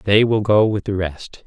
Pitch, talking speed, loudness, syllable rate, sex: 100 Hz, 245 wpm, -18 LUFS, 4.2 syllables/s, male